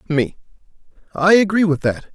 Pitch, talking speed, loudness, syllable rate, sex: 170 Hz, 140 wpm, -17 LUFS, 5.2 syllables/s, male